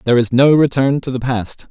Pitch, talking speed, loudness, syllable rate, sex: 130 Hz, 245 wpm, -15 LUFS, 5.7 syllables/s, male